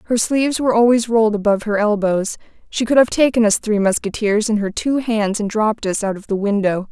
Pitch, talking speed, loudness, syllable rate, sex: 220 Hz, 225 wpm, -17 LUFS, 6.0 syllables/s, female